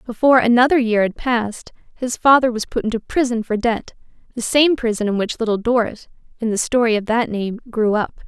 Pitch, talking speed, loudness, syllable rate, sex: 230 Hz, 195 wpm, -18 LUFS, 5.7 syllables/s, female